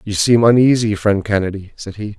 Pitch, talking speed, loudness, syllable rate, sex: 105 Hz, 190 wpm, -14 LUFS, 5.3 syllables/s, male